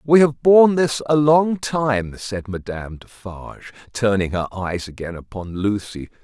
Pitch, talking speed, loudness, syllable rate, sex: 115 Hz, 155 wpm, -19 LUFS, 4.4 syllables/s, male